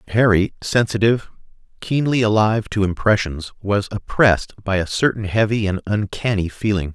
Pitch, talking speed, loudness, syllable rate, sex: 105 Hz, 130 wpm, -19 LUFS, 5.3 syllables/s, male